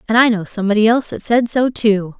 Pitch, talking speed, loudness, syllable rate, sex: 220 Hz, 245 wpm, -15 LUFS, 6.4 syllables/s, female